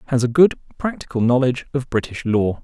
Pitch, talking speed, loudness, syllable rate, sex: 130 Hz, 180 wpm, -19 LUFS, 6.3 syllables/s, male